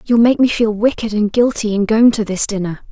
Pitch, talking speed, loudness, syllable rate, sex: 220 Hz, 245 wpm, -15 LUFS, 5.5 syllables/s, female